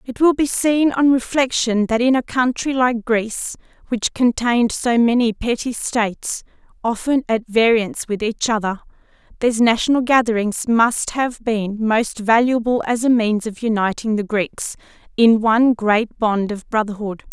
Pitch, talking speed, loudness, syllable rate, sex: 230 Hz, 155 wpm, -18 LUFS, 4.6 syllables/s, female